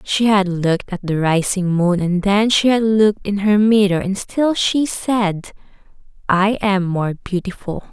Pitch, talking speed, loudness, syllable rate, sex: 200 Hz, 175 wpm, -17 LUFS, 4.2 syllables/s, female